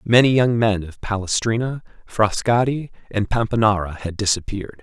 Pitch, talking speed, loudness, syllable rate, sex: 110 Hz, 125 wpm, -20 LUFS, 5.1 syllables/s, male